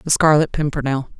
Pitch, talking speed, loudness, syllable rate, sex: 145 Hz, 150 wpm, -18 LUFS, 6.0 syllables/s, female